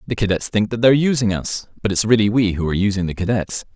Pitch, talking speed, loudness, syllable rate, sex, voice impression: 105 Hz, 270 wpm, -18 LUFS, 7.1 syllables/s, male, masculine, adult-like, thick, powerful, slightly bright, clear, fluent, cool, intellectual, calm, friendly, reassuring, wild, lively